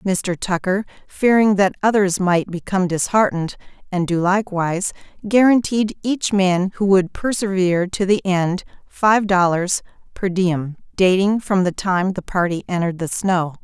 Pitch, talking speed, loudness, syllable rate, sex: 190 Hz, 145 wpm, -19 LUFS, 4.6 syllables/s, female